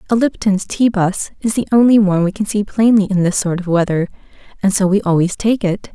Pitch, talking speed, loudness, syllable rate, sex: 200 Hz, 230 wpm, -15 LUFS, 5.8 syllables/s, female